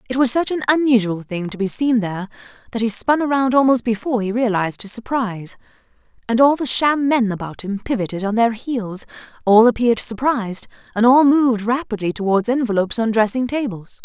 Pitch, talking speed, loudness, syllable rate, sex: 230 Hz, 185 wpm, -18 LUFS, 5.8 syllables/s, female